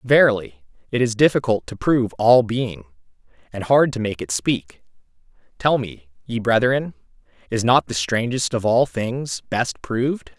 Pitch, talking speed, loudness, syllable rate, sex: 115 Hz, 155 wpm, -20 LUFS, 4.4 syllables/s, male